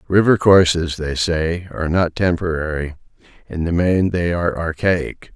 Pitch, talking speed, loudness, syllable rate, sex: 85 Hz, 135 wpm, -18 LUFS, 4.5 syllables/s, male